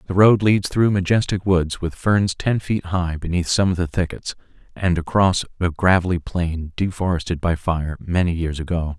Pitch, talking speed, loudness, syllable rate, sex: 90 Hz, 180 wpm, -20 LUFS, 4.8 syllables/s, male